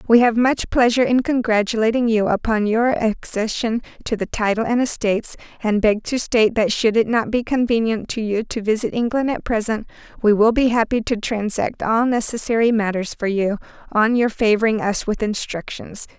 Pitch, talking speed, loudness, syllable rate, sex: 225 Hz, 180 wpm, -19 LUFS, 5.2 syllables/s, female